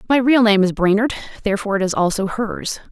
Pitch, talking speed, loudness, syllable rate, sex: 210 Hz, 205 wpm, -18 LUFS, 6.4 syllables/s, female